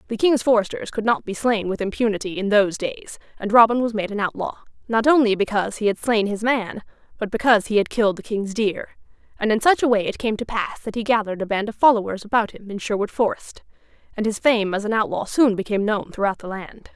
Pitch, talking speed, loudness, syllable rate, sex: 215 Hz, 235 wpm, -21 LUFS, 6.2 syllables/s, female